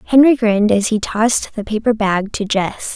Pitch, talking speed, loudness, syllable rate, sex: 220 Hz, 205 wpm, -16 LUFS, 5.1 syllables/s, female